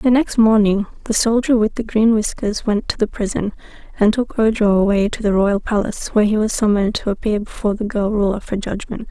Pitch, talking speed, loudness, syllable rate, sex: 210 Hz, 215 wpm, -18 LUFS, 5.8 syllables/s, female